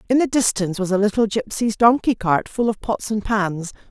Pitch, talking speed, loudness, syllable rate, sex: 210 Hz, 215 wpm, -20 LUFS, 5.4 syllables/s, female